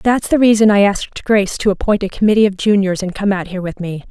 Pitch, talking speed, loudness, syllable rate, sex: 200 Hz, 265 wpm, -15 LUFS, 6.4 syllables/s, female